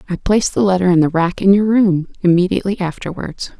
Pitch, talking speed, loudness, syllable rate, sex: 185 Hz, 200 wpm, -15 LUFS, 6.2 syllables/s, female